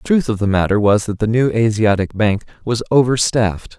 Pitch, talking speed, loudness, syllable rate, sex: 110 Hz, 220 wpm, -16 LUFS, 5.4 syllables/s, male